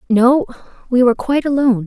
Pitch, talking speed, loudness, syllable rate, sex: 250 Hz, 160 wpm, -15 LUFS, 7.1 syllables/s, female